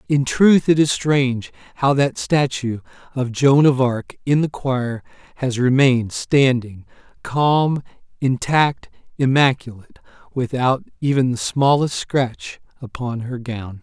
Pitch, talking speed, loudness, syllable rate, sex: 130 Hz, 125 wpm, -19 LUFS, 4.0 syllables/s, male